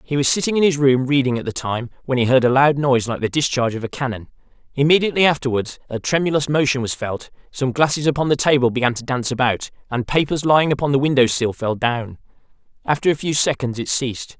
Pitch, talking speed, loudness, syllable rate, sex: 135 Hz, 220 wpm, -19 LUFS, 6.4 syllables/s, male